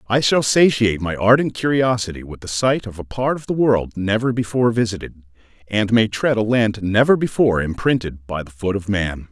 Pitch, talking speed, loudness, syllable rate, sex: 110 Hz, 200 wpm, -18 LUFS, 5.4 syllables/s, male